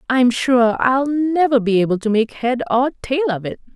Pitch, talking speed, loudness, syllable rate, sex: 250 Hz, 210 wpm, -17 LUFS, 4.7 syllables/s, female